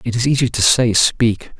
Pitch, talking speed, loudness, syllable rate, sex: 115 Hz, 225 wpm, -15 LUFS, 4.8 syllables/s, male